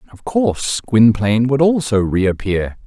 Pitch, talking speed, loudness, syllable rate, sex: 120 Hz, 125 wpm, -16 LUFS, 4.4 syllables/s, male